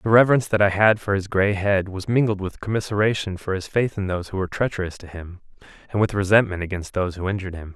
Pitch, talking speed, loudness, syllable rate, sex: 100 Hz, 240 wpm, -22 LUFS, 6.8 syllables/s, male